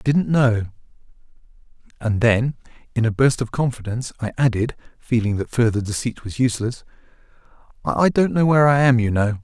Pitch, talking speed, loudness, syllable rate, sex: 120 Hz, 165 wpm, -20 LUFS, 5.7 syllables/s, male